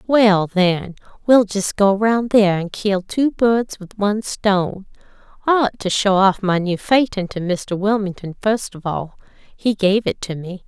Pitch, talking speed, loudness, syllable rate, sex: 200 Hz, 185 wpm, -18 LUFS, 4.2 syllables/s, female